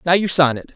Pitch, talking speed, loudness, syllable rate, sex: 160 Hz, 320 wpm, -16 LUFS, 6.4 syllables/s, male